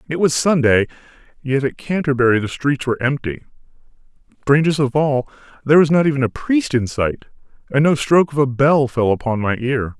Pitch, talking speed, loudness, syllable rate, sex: 135 Hz, 185 wpm, -17 LUFS, 5.7 syllables/s, male